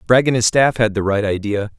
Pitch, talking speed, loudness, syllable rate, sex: 110 Hz, 270 wpm, -17 LUFS, 5.6 syllables/s, male